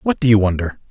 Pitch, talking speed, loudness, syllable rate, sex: 110 Hz, 265 wpm, -16 LUFS, 6.3 syllables/s, male